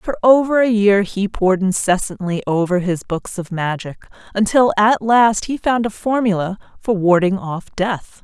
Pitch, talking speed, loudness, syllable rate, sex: 200 Hz, 170 wpm, -17 LUFS, 4.6 syllables/s, female